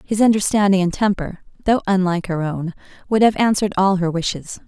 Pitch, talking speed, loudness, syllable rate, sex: 190 Hz, 180 wpm, -18 LUFS, 5.9 syllables/s, female